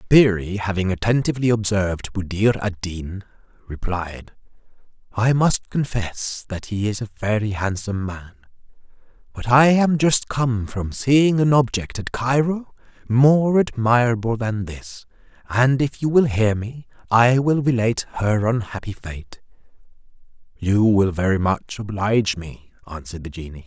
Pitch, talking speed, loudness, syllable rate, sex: 110 Hz, 140 wpm, -20 LUFS, 4.5 syllables/s, male